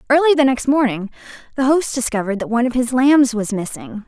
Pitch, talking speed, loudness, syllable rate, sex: 250 Hz, 205 wpm, -17 LUFS, 6.5 syllables/s, female